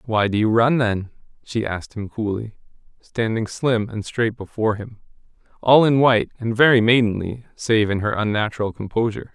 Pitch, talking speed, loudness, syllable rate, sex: 110 Hz, 165 wpm, -20 LUFS, 5.3 syllables/s, male